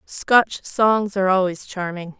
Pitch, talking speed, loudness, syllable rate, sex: 190 Hz, 135 wpm, -19 LUFS, 3.9 syllables/s, female